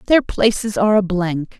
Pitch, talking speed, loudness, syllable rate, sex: 195 Hz, 190 wpm, -17 LUFS, 5.0 syllables/s, female